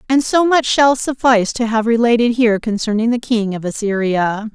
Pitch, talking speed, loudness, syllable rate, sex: 230 Hz, 185 wpm, -15 LUFS, 5.3 syllables/s, female